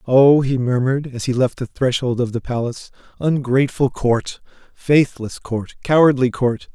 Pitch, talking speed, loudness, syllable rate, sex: 130 Hz, 150 wpm, -18 LUFS, 4.7 syllables/s, male